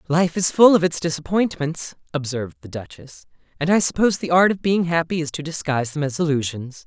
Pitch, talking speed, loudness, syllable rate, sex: 155 Hz, 200 wpm, -20 LUFS, 5.9 syllables/s, male